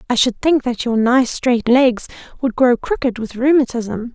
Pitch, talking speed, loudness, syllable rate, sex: 245 Hz, 190 wpm, -16 LUFS, 4.4 syllables/s, female